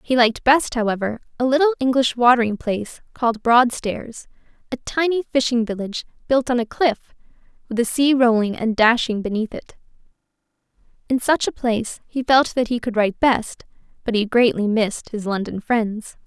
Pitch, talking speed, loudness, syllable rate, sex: 235 Hz, 160 wpm, -20 LUFS, 5.2 syllables/s, female